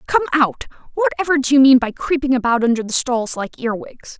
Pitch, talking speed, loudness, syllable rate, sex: 265 Hz, 200 wpm, -17 LUFS, 5.6 syllables/s, female